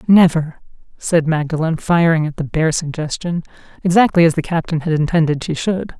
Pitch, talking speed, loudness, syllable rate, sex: 160 Hz, 160 wpm, -17 LUFS, 5.4 syllables/s, female